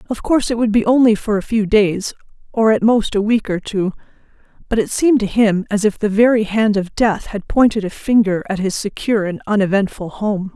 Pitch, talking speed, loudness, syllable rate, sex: 210 Hz, 220 wpm, -16 LUFS, 5.5 syllables/s, female